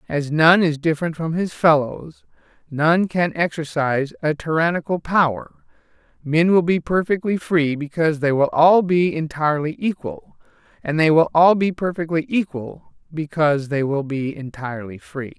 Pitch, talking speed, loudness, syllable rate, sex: 160 Hz, 150 wpm, -19 LUFS, 4.7 syllables/s, male